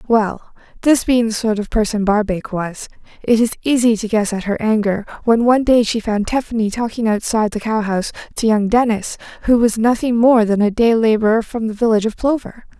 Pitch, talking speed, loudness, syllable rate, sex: 220 Hz, 200 wpm, -17 LUFS, 5.6 syllables/s, female